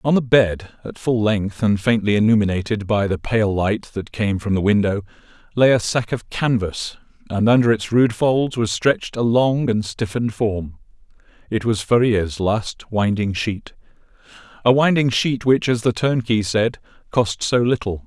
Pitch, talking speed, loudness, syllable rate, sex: 110 Hz, 170 wpm, -19 LUFS, 4.5 syllables/s, male